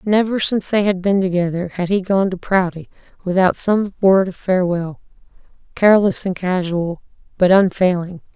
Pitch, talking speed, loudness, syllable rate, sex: 185 Hz, 145 wpm, -17 LUFS, 5.1 syllables/s, female